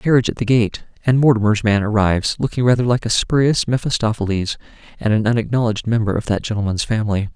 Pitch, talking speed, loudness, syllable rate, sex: 110 Hz, 190 wpm, -18 LUFS, 6.7 syllables/s, male